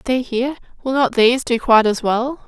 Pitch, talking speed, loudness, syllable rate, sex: 245 Hz, 245 wpm, -17 LUFS, 6.1 syllables/s, female